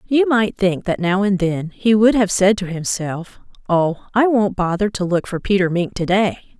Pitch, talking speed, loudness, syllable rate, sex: 195 Hz, 220 wpm, -18 LUFS, 4.6 syllables/s, female